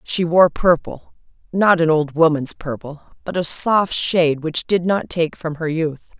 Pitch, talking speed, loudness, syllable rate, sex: 165 Hz, 185 wpm, -18 LUFS, 4.3 syllables/s, female